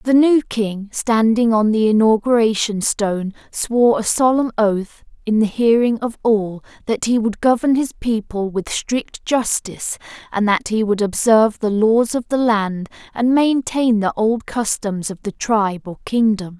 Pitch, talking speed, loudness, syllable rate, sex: 220 Hz, 165 wpm, -18 LUFS, 4.3 syllables/s, female